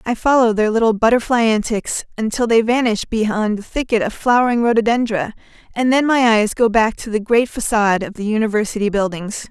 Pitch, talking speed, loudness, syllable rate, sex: 220 Hz, 185 wpm, -17 LUFS, 5.6 syllables/s, female